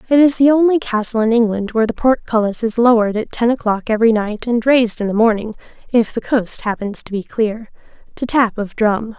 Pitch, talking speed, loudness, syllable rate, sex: 230 Hz, 215 wpm, -16 LUFS, 5.2 syllables/s, female